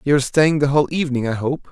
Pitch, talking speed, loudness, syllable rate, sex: 140 Hz, 280 wpm, -18 LUFS, 7.6 syllables/s, male